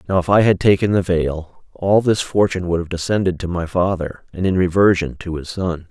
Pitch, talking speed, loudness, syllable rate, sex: 90 Hz, 225 wpm, -18 LUFS, 5.4 syllables/s, male